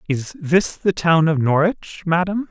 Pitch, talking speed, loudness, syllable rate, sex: 165 Hz, 170 wpm, -18 LUFS, 3.9 syllables/s, male